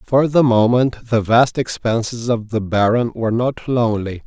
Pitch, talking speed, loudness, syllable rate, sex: 115 Hz, 170 wpm, -17 LUFS, 4.6 syllables/s, male